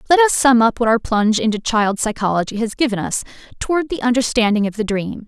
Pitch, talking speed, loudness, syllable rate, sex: 230 Hz, 215 wpm, -17 LUFS, 6.2 syllables/s, female